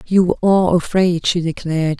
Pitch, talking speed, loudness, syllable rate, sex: 175 Hz, 150 wpm, -16 LUFS, 5.0 syllables/s, female